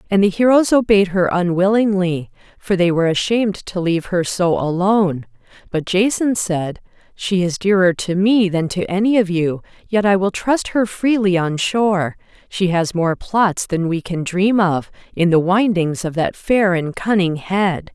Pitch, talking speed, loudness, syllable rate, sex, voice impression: 185 Hz, 180 wpm, -17 LUFS, 4.5 syllables/s, female, very feminine, middle-aged, slightly thin, tensed, slightly powerful, slightly bright, soft, very clear, fluent, slightly raspy, cool, very intellectual, refreshing, sincere, very calm, friendly, reassuring, very unique, very elegant, slightly wild, sweet, lively, kind, slightly modest